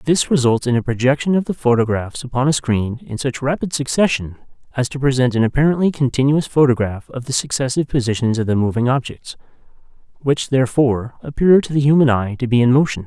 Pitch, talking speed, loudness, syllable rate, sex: 130 Hz, 190 wpm, -17 LUFS, 6.1 syllables/s, male